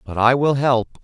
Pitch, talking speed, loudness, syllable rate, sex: 125 Hz, 230 wpm, -17 LUFS, 4.5 syllables/s, male